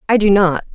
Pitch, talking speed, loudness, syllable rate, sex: 195 Hz, 245 wpm, -14 LUFS, 6.3 syllables/s, female